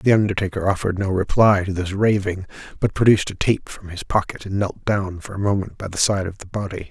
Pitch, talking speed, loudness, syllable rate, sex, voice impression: 100 Hz, 225 wpm, -21 LUFS, 5.9 syllables/s, male, very masculine, very adult-like, very middle-aged, very thick, slightly tensed, powerful, slightly dark, hard, slightly muffled, slightly fluent, slightly raspy, cool, very intellectual, sincere, very calm, very mature, friendly, very reassuring, slightly unique, elegant, slightly wild, slightly sweet, very kind, slightly strict, slightly modest